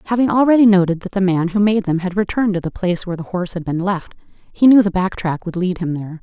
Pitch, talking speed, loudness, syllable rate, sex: 190 Hz, 280 wpm, -17 LUFS, 6.7 syllables/s, female